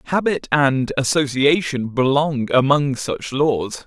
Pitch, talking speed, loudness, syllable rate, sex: 140 Hz, 110 wpm, -18 LUFS, 3.6 syllables/s, male